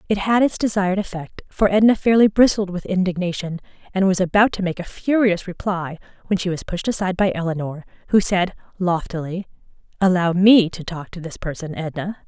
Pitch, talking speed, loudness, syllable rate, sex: 185 Hz, 180 wpm, -20 LUFS, 5.7 syllables/s, female